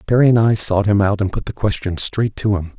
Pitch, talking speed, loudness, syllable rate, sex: 105 Hz, 280 wpm, -17 LUFS, 5.7 syllables/s, male